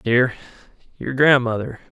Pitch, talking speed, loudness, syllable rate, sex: 125 Hz, 90 wpm, -19 LUFS, 4.2 syllables/s, male